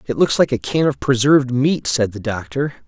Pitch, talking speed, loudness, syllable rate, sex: 130 Hz, 230 wpm, -18 LUFS, 5.2 syllables/s, male